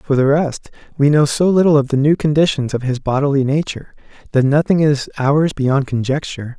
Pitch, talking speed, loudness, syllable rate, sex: 145 Hz, 190 wpm, -16 LUFS, 5.5 syllables/s, male